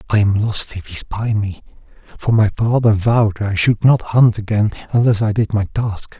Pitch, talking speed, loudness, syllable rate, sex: 105 Hz, 205 wpm, -16 LUFS, 4.8 syllables/s, male